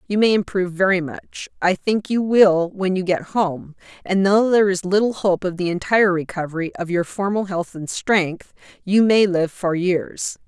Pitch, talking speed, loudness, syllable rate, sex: 190 Hz, 195 wpm, -19 LUFS, 4.7 syllables/s, female